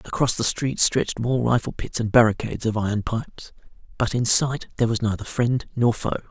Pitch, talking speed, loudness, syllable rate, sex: 115 Hz, 200 wpm, -22 LUFS, 5.7 syllables/s, male